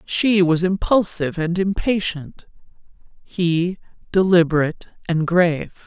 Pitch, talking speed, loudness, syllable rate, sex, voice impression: 175 Hz, 90 wpm, -19 LUFS, 4.3 syllables/s, female, gender-neutral, adult-like, slightly soft, slightly muffled, calm, slightly unique